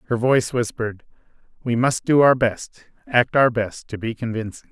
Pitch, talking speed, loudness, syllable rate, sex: 120 Hz, 180 wpm, -20 LUFS, 5.0 syllables/s, male